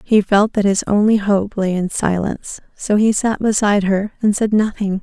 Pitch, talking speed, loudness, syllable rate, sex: 205 Hz, 205 wpm, -16 LUFS, 4.9 syllables/s, female